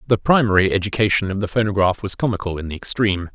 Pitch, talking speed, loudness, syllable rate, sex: 100 Hz, 195 wpm, -19 LUFS, 7.0 syllables/s, male